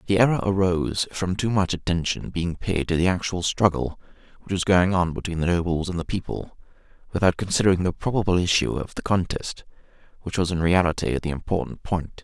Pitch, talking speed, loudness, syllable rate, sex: 90 Hz, 185 wpm, -24 LUFS, 5.8 syllables/s, male